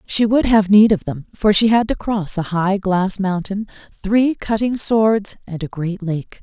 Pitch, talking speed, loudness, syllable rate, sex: 200 Hz, 205 wpm, -17 LUFS, 4.1 syllables/s, female